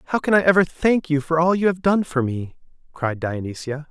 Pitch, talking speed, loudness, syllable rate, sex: 160 Hz, 230 wpm, -20 LUFS, 5.5 syllables/s, male